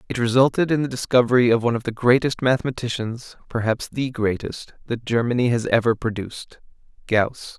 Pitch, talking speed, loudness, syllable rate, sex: 120 Hz, 150 wpm, -21 LUFS, 5.7 syllables/s, male